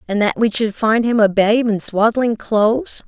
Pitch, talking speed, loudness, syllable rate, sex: 220 Hz, 215 wpm, -16 LUFS, 4.5 syllables/s, female